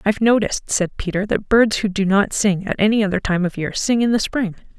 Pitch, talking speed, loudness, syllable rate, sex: 205 Hz, 250 wpm, -18 LUFS, 5.8 syllables/s, female